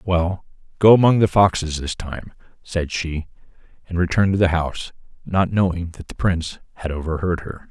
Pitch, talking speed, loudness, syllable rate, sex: 90 Hz, 170 wpm, -20 LUFS, 5.3 syllables/s, male